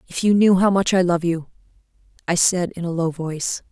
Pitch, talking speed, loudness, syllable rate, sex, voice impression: 175 Hz, 225 wpm, -19 LUFS, 5.5 syllables/s, female, feminine, adult-like, tensed, powerful, slightly soft, clear, intellectual, friendly, reassuring, unique, lively